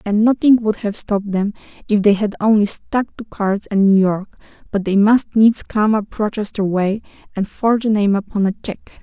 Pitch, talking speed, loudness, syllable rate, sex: 210 Hz, 205 wpm, -17 LUFS, 5.1 syllables/s, female